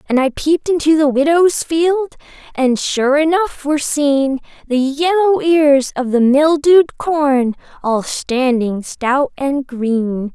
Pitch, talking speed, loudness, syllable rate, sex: 285 Hz, 140 wpm, -15 LUFS, 3.6 syllables/s, female